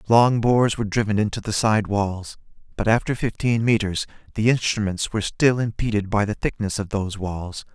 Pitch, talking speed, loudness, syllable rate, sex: 105 Hz, 180 wpm, -22 LUFS, 5.4 syllables/s, male